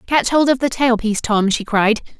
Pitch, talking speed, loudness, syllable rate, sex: 235 Hz, 245 wpm, -16 LUFS, 5.3 syllables/s, female